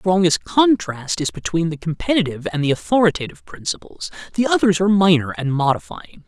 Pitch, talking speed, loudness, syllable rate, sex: 175 Hz, 160 wpm, -19 LUFS, 6.0 syllables/s, male